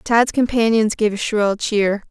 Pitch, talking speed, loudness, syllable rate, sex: 215 Hz, 170 wpm, -18 LUFS, 4.0 syllables/s, female